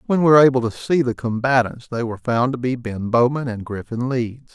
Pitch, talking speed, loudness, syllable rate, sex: 125 Hz, 240 wpm, -19 LUFS, 5.7 syllables/s, male